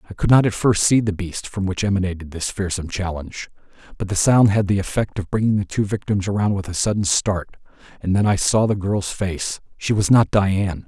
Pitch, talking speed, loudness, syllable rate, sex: 100 Hz, 220 wpm, -20 LUFS, 5.6 syllables/s, male